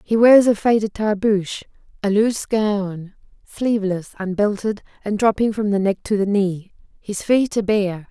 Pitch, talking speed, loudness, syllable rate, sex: 205 Hz, 165 wpm, -19 LUFS, 4.8 syllables/s, female